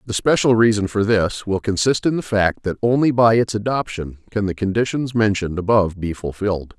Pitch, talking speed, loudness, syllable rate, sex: 105 Hz, 195 wpm, -19 LUFS, 5.5 syllables/s, male